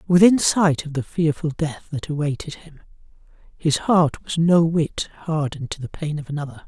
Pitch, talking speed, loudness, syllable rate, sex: 155 Hz, 180 wpm, -21 LUFS, 5.1 syllables/s, male